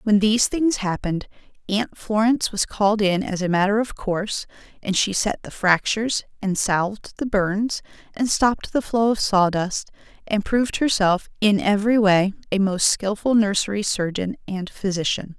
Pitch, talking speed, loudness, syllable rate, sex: 205 Hz, 165 wpm, -21 LUFS, 4.9 syllables/s, female